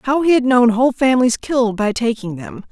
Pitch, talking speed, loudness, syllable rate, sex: 240 Hz, 220 wpm, -16 LUFS, 5.7 syllables/s, female